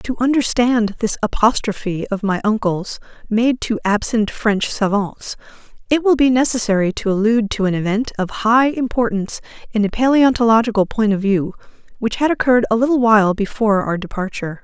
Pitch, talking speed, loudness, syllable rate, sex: 220 Hz, 160 wpm, -17 LUFS, 5.5 syllables/s, female